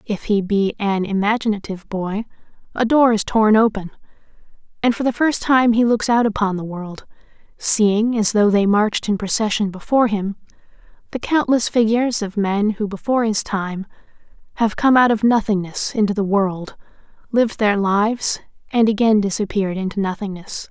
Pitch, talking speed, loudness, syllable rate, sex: 210 Hz, 160 wpm, -18 LUFS, 5.2 syllables/s, female